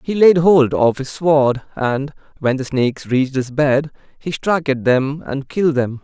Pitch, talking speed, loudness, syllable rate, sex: 140 Hz, 200 wpm, -17 LUFS, 4.3 syllables/s, male